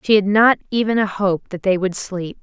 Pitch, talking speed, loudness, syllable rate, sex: 200 Hz, 245 wpm, -18 LUFS, 5.1 syllables/s, female